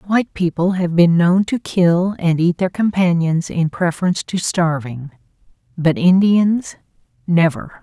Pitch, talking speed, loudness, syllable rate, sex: 175 Hz, 130 wpm, -16 LUFS, 4.3 syllables/s, female